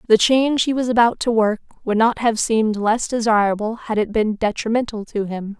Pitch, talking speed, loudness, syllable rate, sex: 225 Hz, 205 wpm, -19 LUFS, 5.4 syllables/s, female